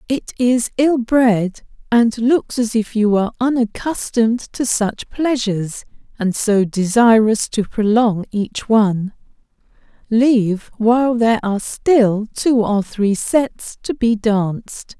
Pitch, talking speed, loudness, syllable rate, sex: 225 Hz, 130 wpm, -17 LUFS, 3.9 syllables/s, female